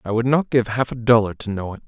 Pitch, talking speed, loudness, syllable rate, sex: 115 Hz, 320 wpm, -20 LUFS, 6.3 syllables/s, male